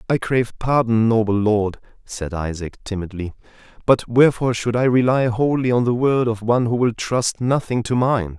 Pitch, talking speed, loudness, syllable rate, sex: 115 Hz, 180 wpm, -19 LUFS, 5.0 syllables/s, male